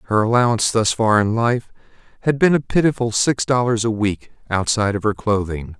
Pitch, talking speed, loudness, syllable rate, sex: 110 Hz, 185 wpm, -18 LUFS, 5.5 syllables/s, male